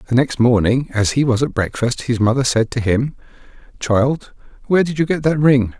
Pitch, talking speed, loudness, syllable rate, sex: 130 Hz, 205 wpm, -17 LUFS, 5.2 syllables/s, male